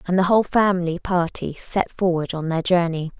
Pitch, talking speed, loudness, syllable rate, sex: 175 Hz, 190 wpm, -21 LUFS, 5.4 syllables/s, female